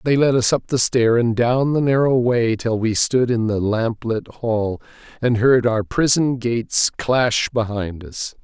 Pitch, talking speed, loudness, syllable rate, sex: 120 Hz, 190 wpm, -19 LUFS, 4.0 syllables/s, male